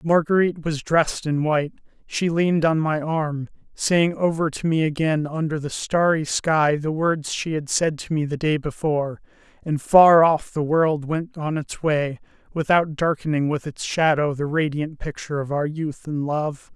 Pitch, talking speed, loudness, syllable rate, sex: 155 Hz, 185 wpm, -22 LUFS, 4.6 syllables/s, male